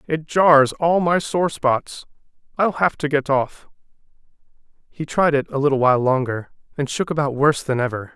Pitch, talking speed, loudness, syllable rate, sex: 145 Hz, 175 wpm, -19 LUFS, 5.0 syllables/s, male